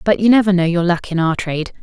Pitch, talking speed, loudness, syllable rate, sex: 180 Hz, 295 wpm, -16 LUFS, 6.7 syllables/s, female